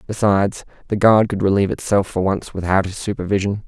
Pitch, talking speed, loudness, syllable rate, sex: 100 Hz, 180 wpm, -18 LUFS, 6.1 syllables/s, male